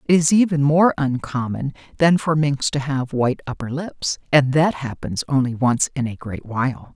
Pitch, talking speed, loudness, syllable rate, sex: 140 Hz, 190 wpm, -20 LUFS, 4.8 syllables/s, female